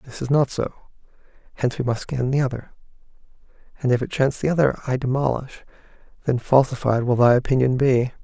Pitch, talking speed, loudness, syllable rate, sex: 130 Hz, 175 wpm, -21 LUFS, 6.1 syllables/s, male